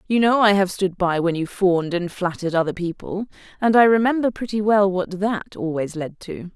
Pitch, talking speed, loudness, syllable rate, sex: 190 Hz, 210 wpm, -20 LUFS, 5.5 syllables/s, female